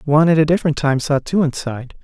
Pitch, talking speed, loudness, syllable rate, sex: 150 Hz, 235 wpm, -17 LUFS, 6.9 syllables/s, male